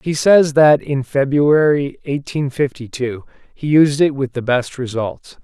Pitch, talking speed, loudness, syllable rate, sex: 140 Hz, 165 wpm, -16 LUFS, 4.0 syllables/s, male